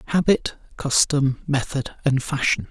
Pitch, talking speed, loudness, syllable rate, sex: 140 Hz, 110 wpm, -22 LUFS, 4.0 syllables/s, male